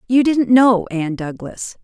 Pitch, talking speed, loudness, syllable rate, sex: 215 Hz, 165 wpm, -16 LUFS, 4.3 syllables/s, female